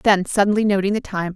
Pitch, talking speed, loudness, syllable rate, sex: 200 Hz, 220 wpm, -19 LUFS, 6.1 syllables/s, female